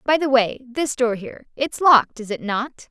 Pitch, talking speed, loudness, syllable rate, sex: 250 Hz, 225 wpm, -20 LUFS, 4.9 syllables/s, female